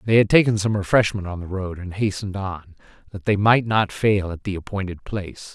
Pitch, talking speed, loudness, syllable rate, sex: 100 Hz, 215 wpm, -21 LUFS, 5.6 syllables/s, male